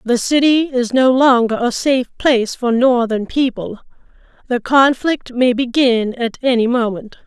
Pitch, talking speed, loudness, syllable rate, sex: 245 Hz, 150 wpm, -15 LUFS, 4.5 syllables/s, female